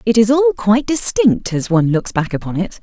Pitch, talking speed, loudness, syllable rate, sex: 220 Hz, 235 wpm, -15 LUFS, 5.8 syllables/s, female